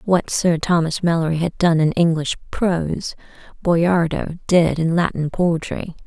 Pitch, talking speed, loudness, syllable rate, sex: 170 Hz, 140 wpm, -19 LUFS, 4.3 syllables/s, female